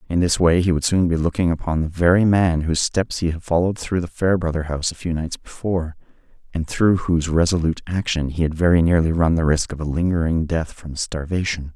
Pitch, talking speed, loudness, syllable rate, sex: 85 Hz, 220 wpm, -20 LUFS, 6.0 syllables/s, male